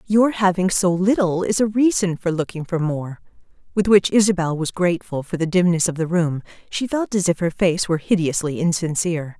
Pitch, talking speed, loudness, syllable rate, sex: 180 Hz, 200 wpm, -20 LUFS, 5.4 syllables/s, female